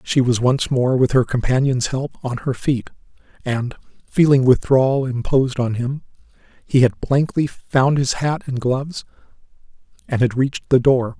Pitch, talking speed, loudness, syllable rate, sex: 130 Hz, 160 wpm, -19 LUFS, 4.7 syllables/s, male